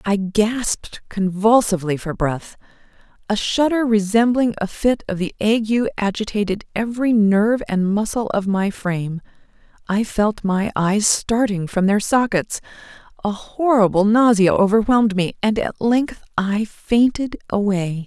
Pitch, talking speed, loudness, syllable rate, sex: 210 Hz, 120 wpm, -19 LUFS, 4.3 syllables/s, female